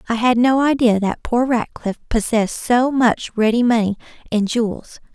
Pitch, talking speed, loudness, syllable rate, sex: 235 Hz, 165 wpm, -18 LUFS, 5.0 syllables/s, female